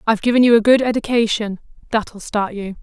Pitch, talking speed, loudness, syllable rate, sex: 220 Hz, 170 wpm, -17 LUFS, 6.0 syllables/s, female